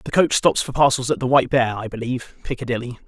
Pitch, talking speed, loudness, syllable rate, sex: 125 Hz, 235 wpm, -20 LUFS, 6.8 syllables/s, male